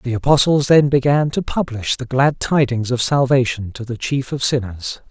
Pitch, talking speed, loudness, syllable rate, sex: 130 Hz, 190 wpm, -17 LUFS, 4.8 syllables/s, male